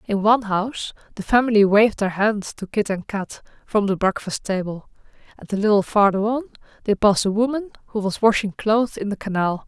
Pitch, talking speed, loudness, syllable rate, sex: 210 Hz, 200 wpm, -20 LUFS, 5.8 syllables/s, female